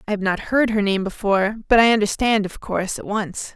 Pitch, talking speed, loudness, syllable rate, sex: 205 Hz, 235 wpm, -20 LUFS, 5.8 syllables/s, female